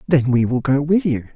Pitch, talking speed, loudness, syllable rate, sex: 140 Hz, 265 wpm, -18 LUFS, 5.2 syllables/s, male